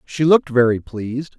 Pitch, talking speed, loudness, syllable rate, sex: 135 Hz, 175 wpm, -18 LUFS, 5.5 syllables/s, male